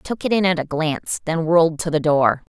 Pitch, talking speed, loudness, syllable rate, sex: 160 Hz, 285 wpm, -19 LUFS, 6.3 syllables/s, female